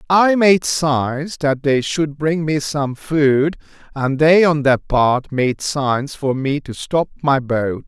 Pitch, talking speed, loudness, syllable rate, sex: 145 Hz, 175 wpm, -17 LUFS, 3.2 syllables/s, male